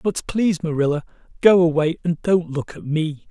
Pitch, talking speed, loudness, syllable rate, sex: 165 Hz, 180 wpm, -20 LUFS, 5.1 syllables/s, male